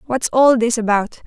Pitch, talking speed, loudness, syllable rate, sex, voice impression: 240 Hz, 190 wpm, -16 LUFS, 4.6 syllables/s, female, very feminine, slightly young, very thin, very tensed, powerful, slightly bright, slightly soft, clear, slightly halting, very cute, intellectual, refreshing, sincere, calm, very friendly, reassuring, slightly elegant, wild, sweet, lively, kind, very strict, sharp